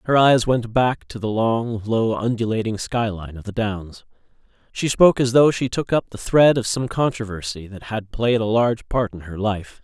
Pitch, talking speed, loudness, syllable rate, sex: 110 Hz, 205 wpm, -20 LUFS, 4.9 syllables/s, male